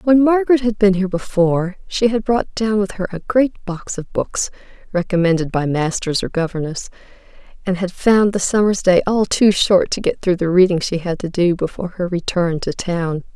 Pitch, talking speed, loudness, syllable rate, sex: 190 Hz, 200 wpm, -18 LUFS, 5.2 syllables/s, female